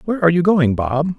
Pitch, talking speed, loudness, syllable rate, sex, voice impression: 165 Hz, 255 wpm, -16 LUFS, 6.6 syllables/s, male, masculine, adult-like, slightly soft, cool, slightly calm, slightly sweet, kind